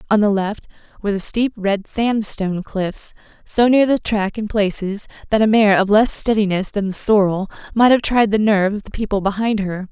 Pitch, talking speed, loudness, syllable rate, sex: 205 Hz, 205 wpm, -18 LUFS, 5.2 syllables/s, female